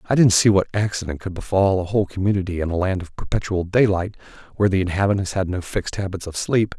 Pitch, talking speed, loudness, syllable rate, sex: 95 Hz, 220 wpm, -21 LUFS, 6.7 syllables/s, male